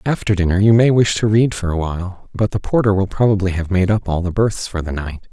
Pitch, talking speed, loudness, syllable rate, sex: 100 Hz, 270 wpm, -17 LUFS, 5.9 syllables/s, male